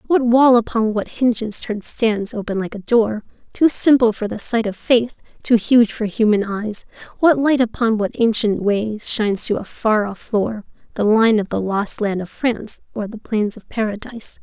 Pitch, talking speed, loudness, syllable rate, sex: 220 Hz, 200 wpm, -18 LUFS, 4.7 syllables/s, female